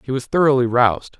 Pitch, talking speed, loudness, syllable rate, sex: 130 Hz, 200 wpm, -17 LUFS, 6.5 syllables/s, male